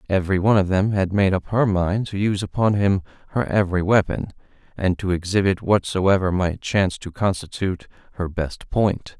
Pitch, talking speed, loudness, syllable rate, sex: 95 Hz, 175 wpm, -21 LUFS, 5.4 syllables/s, male